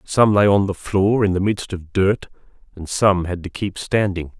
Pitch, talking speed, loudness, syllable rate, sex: 95 Hz, 220 wpm, -19 LUFS, 4.4 syllables/s, male